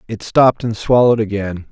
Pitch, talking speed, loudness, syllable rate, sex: 110 Hz, 175 wpm, -15 LUFS, 5.9 syllables/s, male